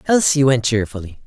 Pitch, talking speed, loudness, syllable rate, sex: 130 Hz, 140 wpm, -17 LUFS, 5.5 syllables/s, male